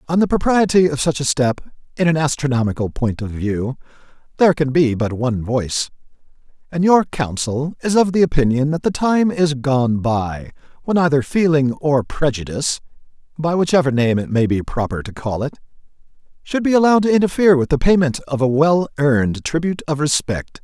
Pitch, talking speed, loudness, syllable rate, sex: 145 Hz, 180 wpm, -18 LUFS, 5.5 syllables/s, male